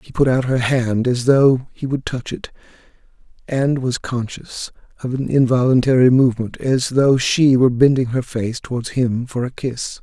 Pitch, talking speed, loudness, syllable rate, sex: 125 Hz, 180 wpm, -17 LUFS, 4.6 syllables/s, male